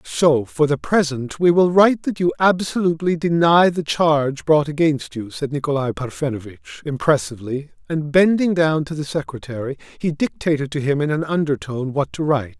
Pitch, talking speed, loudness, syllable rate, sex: 150 Hz, 170 wpm, -19 LUFS, 5.3 syllables/s, male